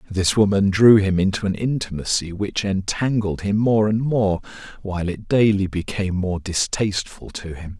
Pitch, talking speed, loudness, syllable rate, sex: 100 Hz, 160 wpm, -20 LUFS, 4.9 syllables/s, male